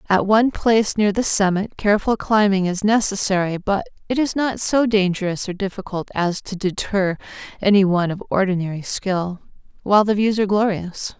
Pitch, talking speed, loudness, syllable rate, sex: 200 Hz, 165 wpm, -19 LUFS, 5.4 syllables/s, female